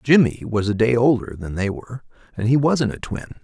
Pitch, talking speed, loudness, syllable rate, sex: 120 Hz, 225 wpm, -20 LUFS, 5.6 syllables/s, male